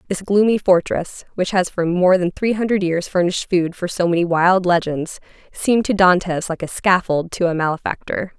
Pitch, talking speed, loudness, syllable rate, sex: 180 Hz, 195 wpm, -18 LUFS, 5.2 syllables/s, female